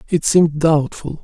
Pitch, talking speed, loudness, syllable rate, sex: 160 Hz, 145 wpm, -15 LUFS, 4.7 syllables/s, male